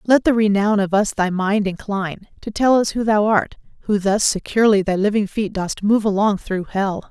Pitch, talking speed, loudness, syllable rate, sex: 205 Hz, 210 wpm, -18 LUFS, 5.1 syllables/s, female